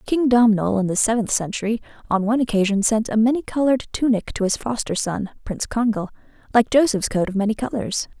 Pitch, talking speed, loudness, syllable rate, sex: 225 Hz, 190 wpm, -20 LUFS, 6.1 syllables/s, female